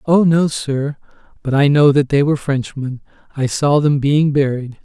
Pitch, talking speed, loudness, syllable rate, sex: 140 Hz, 185 wpm, -16 LUFS, 4.6 syllables/s, male